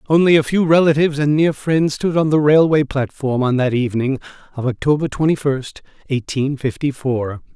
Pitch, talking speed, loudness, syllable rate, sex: 140 Hz, 175 wpm, -17 LUFS, 5.3 syllables/s, male